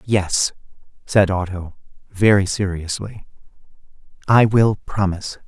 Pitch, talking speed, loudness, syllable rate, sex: 100 Hz, 90 wpm, -19 LUFS, 4.0 syllables/s, male